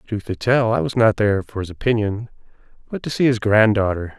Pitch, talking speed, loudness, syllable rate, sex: 105 Hz, 215 wpm, -19 LUFS, 5.8 syllables/s, male